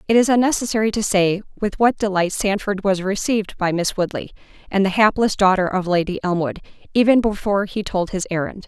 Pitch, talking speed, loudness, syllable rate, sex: 200 Hz, 185 wpm, -19 LUFS, 5.8 syllables/s, female